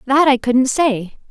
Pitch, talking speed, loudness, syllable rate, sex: 260 Hz, 185 wpm, -16 LUFS, 3.7 syllables/s, female